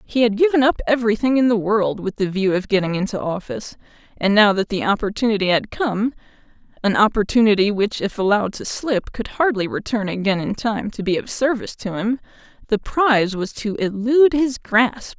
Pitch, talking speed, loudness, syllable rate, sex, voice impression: 215 Hz, 180 wpm, -19 LUFS, 5.6 syllables/s, female, feminine, adult-like, tensed, powerful, clear, fluent, slightly raspy, friendly, lively, intense